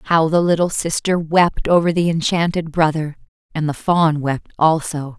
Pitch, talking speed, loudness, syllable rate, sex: 160 Hz, 160 wpm, -18 LUFS, 4.4 syllables/s, female